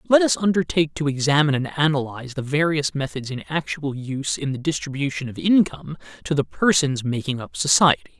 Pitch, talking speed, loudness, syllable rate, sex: 145 Hz, 175 wpm, -21 LUFS, 6.0 syllables/s, male